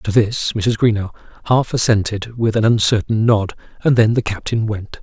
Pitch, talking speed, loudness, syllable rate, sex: 110 Hz, 180 wpm, -17 LUFS, 4.9 syllables/s, male